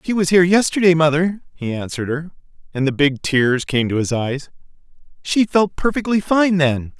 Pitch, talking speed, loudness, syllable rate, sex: 160 Hz, 180 wpm, -18 LUFS, 5.1 syllables/s, male